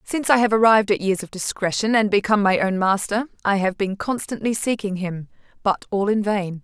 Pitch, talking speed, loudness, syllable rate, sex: 205 Hz, 210 wpm, -20 LUFS, 5.7 syllables/s, female